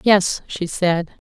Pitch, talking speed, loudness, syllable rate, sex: 180 Hz, 140 wpm, -20 LUFS, 2.9 syllables/s, female